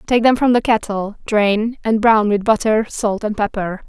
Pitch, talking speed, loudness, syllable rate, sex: 215 Hz, 200 wpm, -17 LUFS, 4.4 syllables/s, female